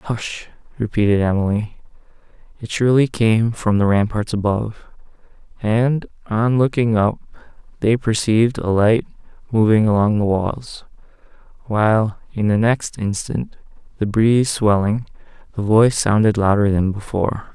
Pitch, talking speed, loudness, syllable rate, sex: 110 Hz, 125 wpm, -18 LUFS, 4.7 syllables/s, male